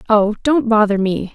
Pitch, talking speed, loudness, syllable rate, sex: 215 Hz, 180 wpm, -16 LUFS, 4.6 syllables/s, female